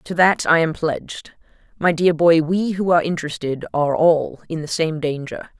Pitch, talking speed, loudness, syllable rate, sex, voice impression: 160 Hz, 195 wpm, -19 LUFS, 5.1 syllables/s, female, feminine, adult-like, tensed, powerful, hard, fluent, intellectual, calm, elegant, lively, strict, sharp